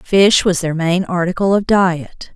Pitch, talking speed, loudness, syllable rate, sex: 180 Hz, 180 wpm, -15 LUFS, 3.9 syllables/s, female